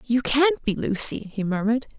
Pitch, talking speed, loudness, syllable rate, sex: 240 Hz, 180 wpm, -22 LUFS, 5.0 syllables/s, female